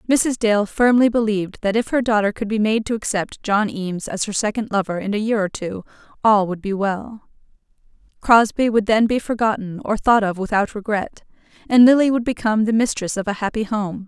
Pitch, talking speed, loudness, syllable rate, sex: 215 Hz, 205 wpm, -19 LUFS, 5.4 syllables/s, female